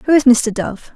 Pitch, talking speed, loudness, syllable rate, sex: 250 Hz, 250 wpm, -14 LUFS, 4.4 syllables/s, female